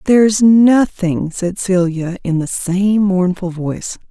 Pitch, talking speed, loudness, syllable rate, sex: 190 Hz, 130 wpm, -15 LUFS, 3.7 syllables/s, female